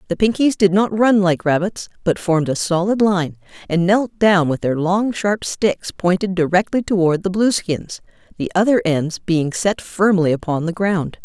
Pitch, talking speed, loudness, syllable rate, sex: 185 Hz, 180 wpm, -18 LUFS, 4.5 syllables/s, female